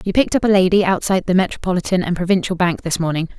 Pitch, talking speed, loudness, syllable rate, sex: 185 Hz, 230 wpm, -17 LUFS, 7.5 syllables/s, female